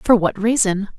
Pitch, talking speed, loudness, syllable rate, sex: 205 Hz, 185 wpm, -17 LUFS, 4.6 syllables/s, female